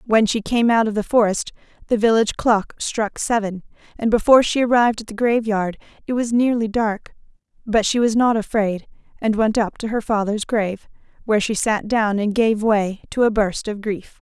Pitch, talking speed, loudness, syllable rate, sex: 220 Hz, 195 wpm, -19 LUFS, 5.2 syllables/s, female